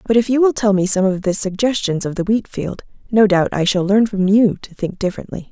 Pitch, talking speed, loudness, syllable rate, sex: 200 Hz, 260 wpm, -17 LUFS, 5.8 syllables/s, female